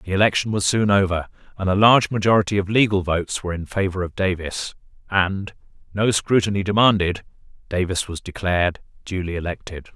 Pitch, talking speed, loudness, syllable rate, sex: 95 Hz, 155 wpm, -20 LUFS, 5.8 syllables/s, male